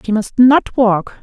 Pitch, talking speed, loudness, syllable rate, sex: 230 Hz, 195 wpm, -13 LUFS, 4.0 syllables/s, female